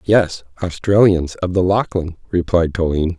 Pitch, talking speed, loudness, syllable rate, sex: 90 Hz, 130 wpm, -17 LUFS, 4.7 syllables/s, male